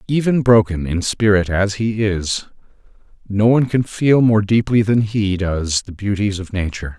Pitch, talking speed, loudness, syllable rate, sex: 105 Hz, 170 wpm, -17 LUFS, 4.7 syllables/s, male